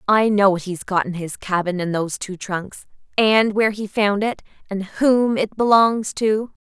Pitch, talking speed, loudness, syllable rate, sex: 200 Hz, 200 wpm, -20 LUFS, 4.5 syllables/s, female